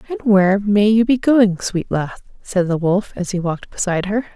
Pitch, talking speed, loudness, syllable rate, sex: 200 Hz, 220 wpm, -17 LUFS, 5.2 syllables/s, female